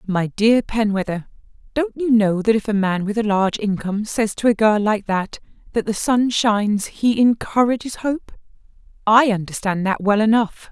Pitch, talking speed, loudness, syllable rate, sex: 215 Hz, 180 wpm, -19 LUFS, 4.8 syllables/s, female